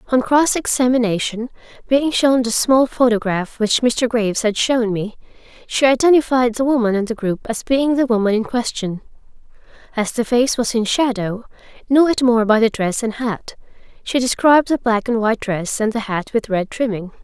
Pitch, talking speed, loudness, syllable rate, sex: 235 Hz, 190 wpm, -17 LUFS, 5.1 syllables/s, female